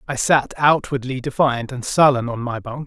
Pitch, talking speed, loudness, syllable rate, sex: 130 Hz, 190 wpm, -19 LUFS, 4.8 syllables/s, male